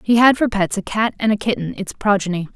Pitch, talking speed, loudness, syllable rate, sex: 205 Hz, 260 wpm, -18 LUFS, 5.9 syllables/s, female